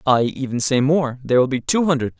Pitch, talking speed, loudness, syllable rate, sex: 135 Hz, 220 wpm, -19 LUFS, 6.0 syllables/s, male